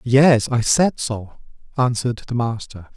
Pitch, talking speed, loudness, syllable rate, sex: 120 Hz, 140 wpm, -19 LUFS, 4.1 syllables/s, male